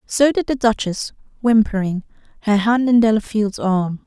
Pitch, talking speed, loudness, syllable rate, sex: 220 Hz, 150 wpm, -18 LUFS, 4.7 syllables/s, female